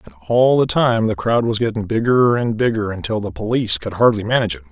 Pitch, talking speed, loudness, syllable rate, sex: 110 Hz, 230 wpm, -17 LUFS, 6.2 syllables/s, male